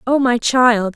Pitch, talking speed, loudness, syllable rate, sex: 240 Hz, 190 wpm, -15 LUFS, 3.5 syllables/s, female